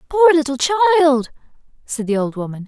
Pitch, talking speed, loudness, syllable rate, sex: 285 Hz, 155 wpm, -16 LUFS, 4.6 syllables/s, female